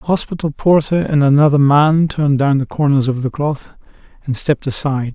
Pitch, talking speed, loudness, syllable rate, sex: 145 Hz, 185 wpm, -15 LUFS, 5.6 syllables/s, male